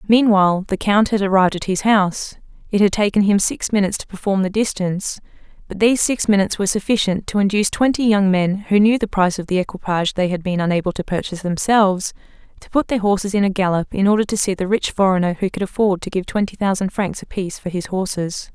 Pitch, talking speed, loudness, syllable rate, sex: 195 Hz, 225 wpm, -18 LUFS, 6.5 syllables/s, female